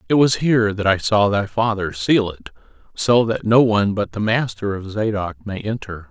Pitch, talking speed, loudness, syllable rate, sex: 105 Hz, 205 wpm, -19 LUFS, 5.0 syllables/s, male